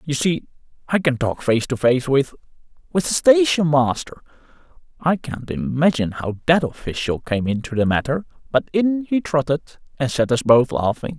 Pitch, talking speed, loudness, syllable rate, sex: 145 Hz, 165 wpm, -20 LUFS, 4.9 syllables/s, male